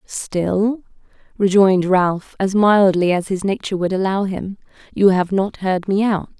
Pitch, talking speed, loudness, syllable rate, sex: 190 Hz, 160 wpm, -17 LUFS, 4.4 syllables/s, female